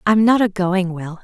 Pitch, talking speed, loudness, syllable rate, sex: 195 Hz, 245 wpm, -17 LUFS, 4.6 syllables/s, female